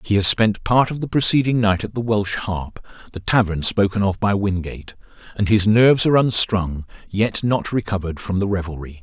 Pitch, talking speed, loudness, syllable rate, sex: 100 Hz, 185 wpm, -19 LUFS, 5.4 syllables/s, male